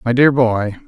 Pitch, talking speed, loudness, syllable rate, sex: 120 Hz, 205 wpm, -15 LUFS, 4.3 syllables/s, male